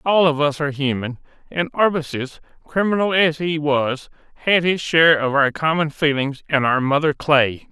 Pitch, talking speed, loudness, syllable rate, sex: 150 Hz, 170 wpm, -19 LUFS, 4.9 syllables/s, male